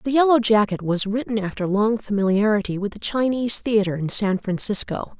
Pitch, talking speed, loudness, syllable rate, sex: 215 Hz, 175 wpm, -21 LUFS, 5.5 syllables/s, female